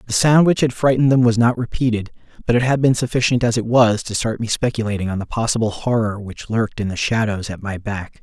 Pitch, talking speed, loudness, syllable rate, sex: 115 Hz, 240 wpm, -18 LUFS, 6.1 syllables/s, male